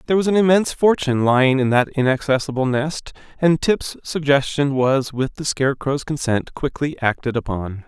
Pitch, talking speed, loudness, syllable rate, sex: 140 Hz, 160 wpm, -19 LUFS, 5.3 syllables/s, male